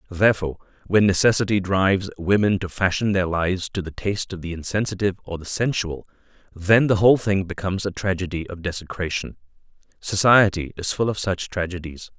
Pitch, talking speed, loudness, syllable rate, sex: 95 Hz, 160 wpm, -22 LUFS, 5.9 syllables/s, male